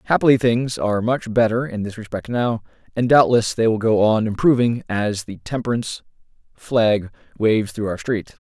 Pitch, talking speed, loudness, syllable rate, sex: 115 Hz, 170 wpm, -20 LUFS, 5.1 syllables/s, male